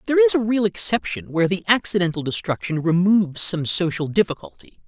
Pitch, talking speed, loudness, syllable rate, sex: 185 Hz, 160 wpm, -20 LUFS, 6.0 syllables/s, male